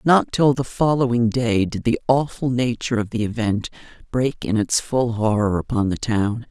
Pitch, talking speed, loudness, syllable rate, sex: 115 Hz, 185 wpm, -21 LUFS, 4.8 syllables/s, female